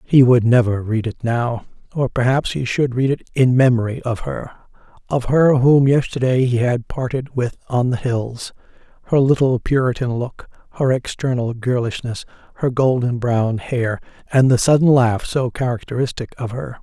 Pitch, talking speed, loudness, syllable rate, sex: 125 Hz, 160 wpm, -18 LUFS, 4.8 syllables/s, male